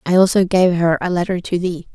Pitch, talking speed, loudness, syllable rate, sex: 180 Hz, 245 wpm, -17 LUFS, 5.7 syllables/s, female